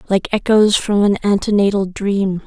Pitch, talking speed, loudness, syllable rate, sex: 200 Hz, 145 wpm, -16 LUFS, 4.5 syllables/s, female